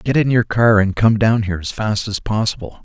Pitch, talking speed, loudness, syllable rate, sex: 110 Hz, 255 wpm, -17 LUFS, 5.4 syllables/s, male